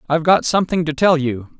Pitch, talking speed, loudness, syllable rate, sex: 155 Hz, 225 wpm, -17 LUFS, 6.4 syllables/s, male